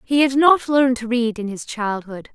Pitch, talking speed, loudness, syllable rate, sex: 245 Hz, 230 wpm, -19 LUFS, 5.0 syllables/s, female